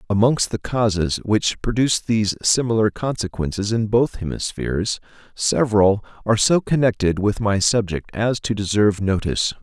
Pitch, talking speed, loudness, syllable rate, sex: 105 Hz, 135 wpm, -20 LUFS, 5.2 syllables/s, male